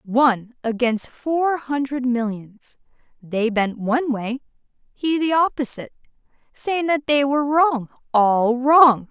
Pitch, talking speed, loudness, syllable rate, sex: 260 Hz, 125 wpm, -20 LUFS, 4.0 syllables/s, female